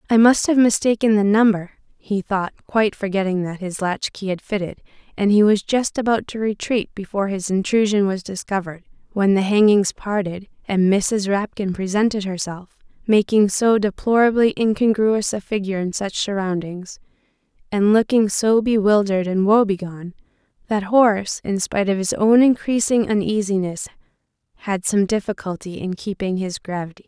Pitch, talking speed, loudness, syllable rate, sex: 205 Hz, 150 wpm, -19 LUFS, 5.2 syllables/s, female